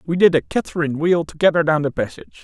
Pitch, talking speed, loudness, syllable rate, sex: 150 Hz, 220 wpm, -19 LUFS, 6.9 syllables/s, male